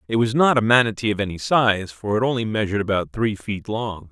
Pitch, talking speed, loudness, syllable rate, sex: 110 Hz, 235 wpm, -21 LUFS, 5.9 syllables/s, male